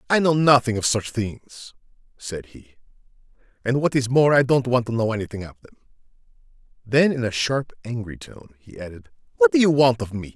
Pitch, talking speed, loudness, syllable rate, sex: 120 Hz, 195 wpm, -21 LUFS, 5.4 syllables/s, male